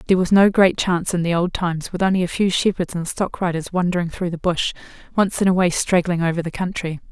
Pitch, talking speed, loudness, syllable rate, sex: 175 Hz, 245 wpm, -20 LUFS, 6.3 syllables/s, female